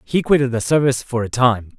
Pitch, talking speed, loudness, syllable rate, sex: 125 Hz, 235 wpm, -17 LUFS, 5.9 syllables/s, male